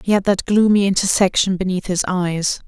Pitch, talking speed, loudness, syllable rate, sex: 190 Hz, 180 wpm, -17 LUFS, 5.2 syllables/s, female